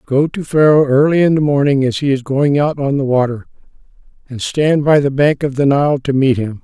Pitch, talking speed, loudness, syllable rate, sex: 140 Hz, 235 wpm, -14 LUFS, 5.2 syllables/s, male